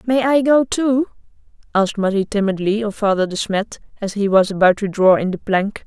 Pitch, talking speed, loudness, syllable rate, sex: 210 Hz, 205 wpm, -17 LUFS, 5.4 syllables/s, female